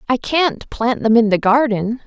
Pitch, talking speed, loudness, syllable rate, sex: 235 Hz, 205 wpm, -16 LUFS, 4.3 syllables/s, female